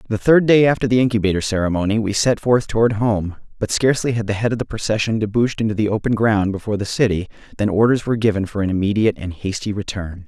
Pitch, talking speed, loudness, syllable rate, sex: 110 Hz, 220 wpm, -18 LUFS, 6.8 syllables/s, male